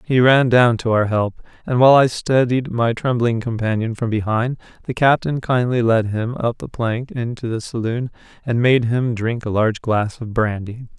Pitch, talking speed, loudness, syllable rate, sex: 120 Hz, 190 wpm, -18 LUFS, 4.7 syllables/s, male